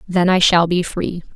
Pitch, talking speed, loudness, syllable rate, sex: 175 Hz, 220 wpm, -16 LUFS, 4.4 syllables/s, female